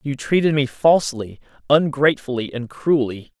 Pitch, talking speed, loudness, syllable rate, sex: 135 Hz, 125 wpm, -19 LUFS, 5.1 syllables/s, male